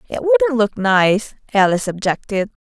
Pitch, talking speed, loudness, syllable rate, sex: 230 Hz, 135 wpm, -17 LUFS, 5.5 syllables/s, female